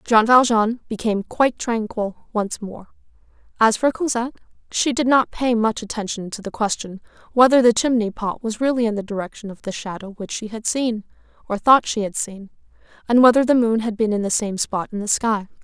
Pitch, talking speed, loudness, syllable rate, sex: 225 Hz, 205 wpm, -20 LUFS, 5.5 syllables/s, female